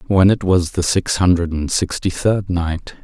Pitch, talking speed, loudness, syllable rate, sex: 90 Hz, 195 wpm, -17 LUFS, 4.3 syllables/s, male